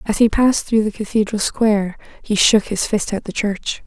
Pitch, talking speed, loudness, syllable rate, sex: 210 Hz, 215 wpm, -18 LUFS, 5.2 syllables/s, female